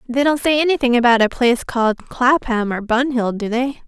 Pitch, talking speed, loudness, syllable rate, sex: 245 Hz, 215 wpm, -17 LUFS, 5.4 syllables/s, female